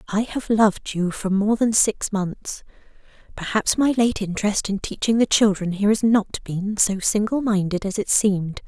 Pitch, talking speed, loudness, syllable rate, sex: 205 Hz, 185 wpm, -21 LUFS, 4.8 syllables/s, female